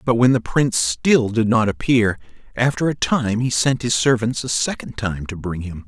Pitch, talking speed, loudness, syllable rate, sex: 115 Hz, 215 wpm, -19 LUFS, 4.8 syllables/s, male